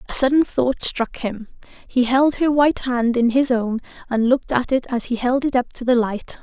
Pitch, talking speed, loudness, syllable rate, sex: 250 Hz, 235 wpm, -19 LUFS, 5.0 syllables/s, female